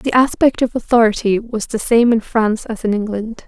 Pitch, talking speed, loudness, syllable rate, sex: 225 Hz, 205 wpm, -16 LUFS, 5.3 syllables/s, female